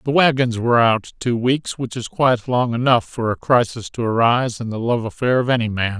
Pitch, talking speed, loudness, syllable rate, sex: 120 Hz, 220 wpm, -19 LUFS, 5.5 syllables/s, male